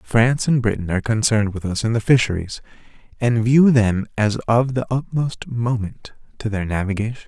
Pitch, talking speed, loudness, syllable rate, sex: 115 Hz, 175 wpm, -19 LUFS, 5.4 syllables/s, male